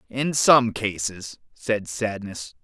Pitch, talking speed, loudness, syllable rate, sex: 110 Hz, 115 wpm, -22 LUFS, 3.1 syllables/s, male